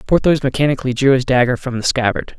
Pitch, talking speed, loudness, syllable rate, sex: 130 Hz, 200 wpm, -16 LUFS, 6.7 syllables/s, male